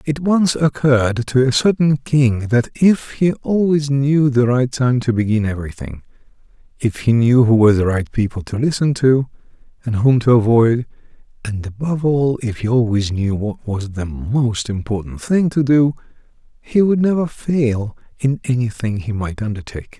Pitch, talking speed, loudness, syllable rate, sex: 125 Hz, 170 wpm, -17 LUFS, 4.7 syllables/s, male